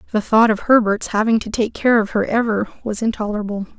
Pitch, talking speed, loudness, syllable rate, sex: 220 Hz, 205 wpm, -18 LUFS, 6.0 syllables/s, female